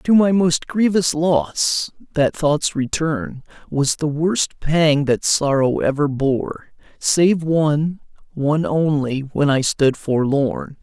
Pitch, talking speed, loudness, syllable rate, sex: 150 Hz, 130 wpm, -18 LUFS, 3.3 syllables/s, male